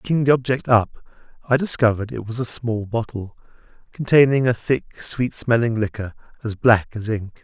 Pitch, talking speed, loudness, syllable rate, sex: 115 Hz, 170 wpm, -20 LUFS, 5.1 syllables/s, male